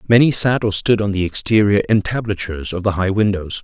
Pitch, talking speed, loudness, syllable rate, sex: 100 Hz, 200 wpm, -17 LUFS, 5.8 syllables/s, male